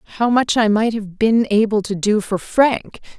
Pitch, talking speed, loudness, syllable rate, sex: 215 Hz, 205 wpm, -17 LUFS, 4.6 syllables/s, female